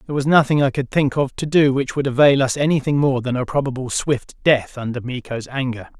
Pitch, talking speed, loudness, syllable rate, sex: 135 Hz, 230 wpm, -19 LUFS, 5.8 syllables/s, male